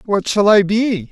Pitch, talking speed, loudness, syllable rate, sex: 205 Hz, 215 wpm, -14 LUFS, 4.0 syllables/s, male